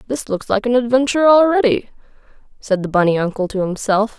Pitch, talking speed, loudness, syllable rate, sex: 225 Hz, 170 wpm, -16 LUFS, 5.9 syllables/s, female